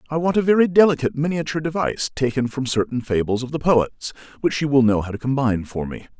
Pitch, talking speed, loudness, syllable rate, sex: 135 Hz, 225 wpm, -20 LUFS, 6.6 syllables/s, male